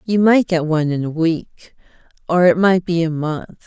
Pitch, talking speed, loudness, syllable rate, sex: 170 Hz, 215 wpm, -17 LUFS, 4.7 syllables/s, female